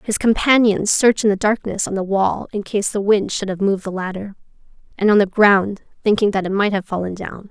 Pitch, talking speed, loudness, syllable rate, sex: 200 Hz, 230 wpm, -18 LUFS, 5.7 syllables/s, female